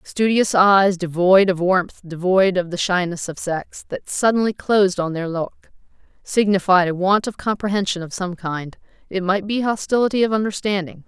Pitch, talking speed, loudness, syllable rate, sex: 190 Hz, 170 wpm, -19 LUFS, 4.9 syllables/s, female